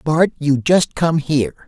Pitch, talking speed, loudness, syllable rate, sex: 150 Hz, 180 wpm, -17 LUFS, 4.3 syllables/s, male